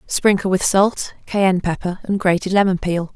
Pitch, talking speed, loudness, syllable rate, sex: 190 Hz, 170 wpm, -18 LUFS, 4.9 syllables/s, female